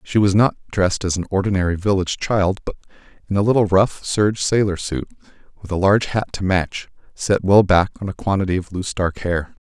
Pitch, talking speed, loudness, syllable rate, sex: 95 Hz, 205 wpm, -19 LUFS, 5.9 syllables/s, male